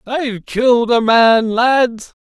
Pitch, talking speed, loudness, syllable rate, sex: 235 Hz, 135 wpm, -14 LUFS, 3.5 syllables/s, male